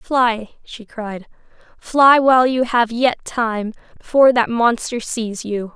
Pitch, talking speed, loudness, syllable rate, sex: 240 Hz, 145 wpm, -17 LUFS, 3.7 syllables/s, female